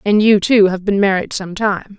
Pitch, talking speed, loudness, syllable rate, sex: 200 Hz, 240 wpm, -15 LUFS, 4.8 syllables/s, female